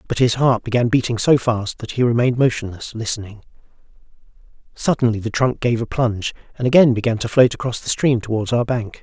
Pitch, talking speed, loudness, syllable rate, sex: 120 Hz, 195 wpm, -19 LUFS, 6.0 syllables/s, male